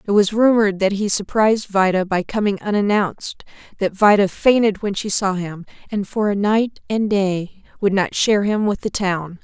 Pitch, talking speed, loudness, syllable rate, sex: 200 Hz, 190 wpm, -18 LUFS, 5.0 syllables/s, female